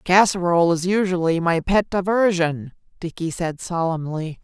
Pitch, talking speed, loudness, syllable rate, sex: 175 Hz, 120 wpm, -20 LUFS, 4.7 syllables/s, female